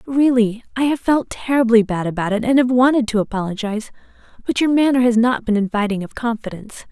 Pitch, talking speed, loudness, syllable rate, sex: 235 Hz, 190 wpm, -18 LUFS, 6.1 syllables/s, female